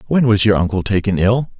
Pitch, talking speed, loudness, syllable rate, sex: 105 Hz, 225 wpm, -15 LUFS, 5.8 syllables/s, male